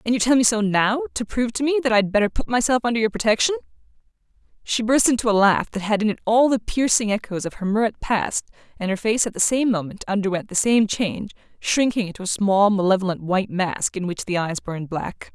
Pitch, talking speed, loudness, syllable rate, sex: 215 Hz, 230 wpm, -21 LUFS, 6.0 syllables/s, female